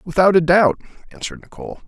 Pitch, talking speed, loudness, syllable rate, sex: 175 Hz, 160 wpm, -15 LUFS, 6.3 syllables/s, male